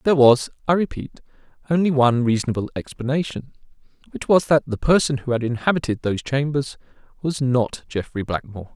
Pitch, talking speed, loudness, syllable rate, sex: 135 Hz, 150 wpm, -21 LUFS, 6.1 syllables/s, male